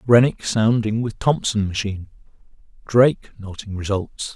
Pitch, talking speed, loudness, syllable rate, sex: 110 Hz, 110 wpm, -20 LUFS, 4.7 syllables/s, male